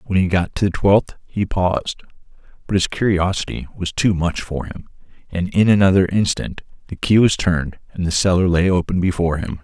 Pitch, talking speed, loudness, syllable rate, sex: 90 Hz, 195 wpm, -18 LUFS, 5.5 syllables/s, male